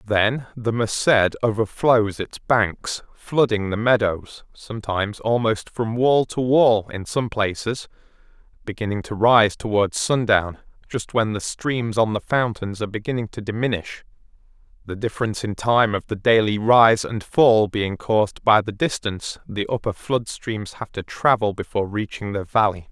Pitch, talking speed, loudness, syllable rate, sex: 110 Hz, 155 wpm, -21 LUFS, 4.6 syllables/s, male